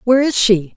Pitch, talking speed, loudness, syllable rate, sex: 230 Hz, 235 wpm, -14 LUFS, 6.2 syllables/s, female